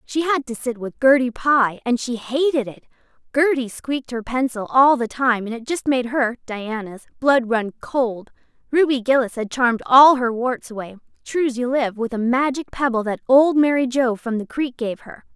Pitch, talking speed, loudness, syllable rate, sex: 250 Hz, 190 wpm, -20 LUFS, 4.9 syllables/s, female